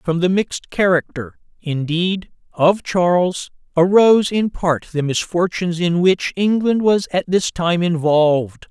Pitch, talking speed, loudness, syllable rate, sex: 175 Hz, 140 wpm, -17 LUFS, 4.3 syllables/s, male